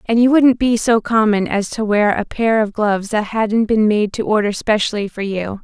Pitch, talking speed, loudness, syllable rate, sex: 215 Hz, 235 wpm, -16 LUFS, 4.9 syllables/s, female